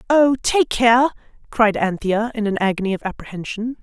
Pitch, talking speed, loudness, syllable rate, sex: 225 Hz, 155 wpm, -19 LUFS, 5.1 syllables/s, female